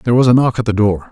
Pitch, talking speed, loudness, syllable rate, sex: 115 Hz, 375 wpm, -13 LUFS, 7.5 syllables/s, male